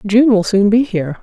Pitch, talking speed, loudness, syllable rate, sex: 210 Hz, 245 wpm, -13 LUFS, 5.5 syllables/s, female